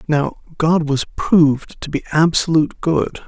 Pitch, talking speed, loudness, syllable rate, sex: 155 Hz, 145 wpm, -17 LUFS, 4.4 syllables/s, male